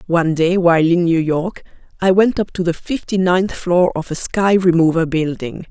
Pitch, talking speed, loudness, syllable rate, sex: 175 Hz, 200 wpm, -16 LUFS, 4.9 syllables/s, female